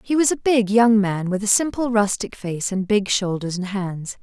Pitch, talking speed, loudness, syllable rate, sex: 210 Hz, 225 wpm, -20 LUFS, 4.6 syllables/s, female